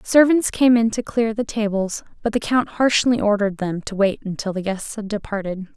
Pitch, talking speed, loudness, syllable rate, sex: 215 Hz, 210 wpm, -20 LUFS, 5.2 syllables/s, female